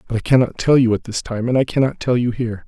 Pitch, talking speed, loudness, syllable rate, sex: 120 Hz, 315 wpm, -18 LUFS, 6.8 syllables/s, male